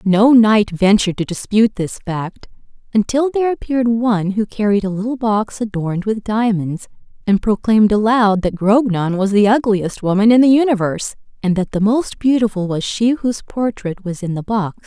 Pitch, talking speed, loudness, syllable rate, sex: 210 Hz, 180 wpm, -16 LUFS, 5.3 syllables/s, female